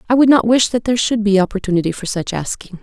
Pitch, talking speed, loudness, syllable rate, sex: 210 Hz, 255 wpm, -16 LUFS, 6.8 syllables/s, female